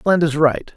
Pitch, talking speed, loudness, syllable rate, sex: 155 Hz, 235 wpm, -17 LUFS, 4.8 syllables/s, male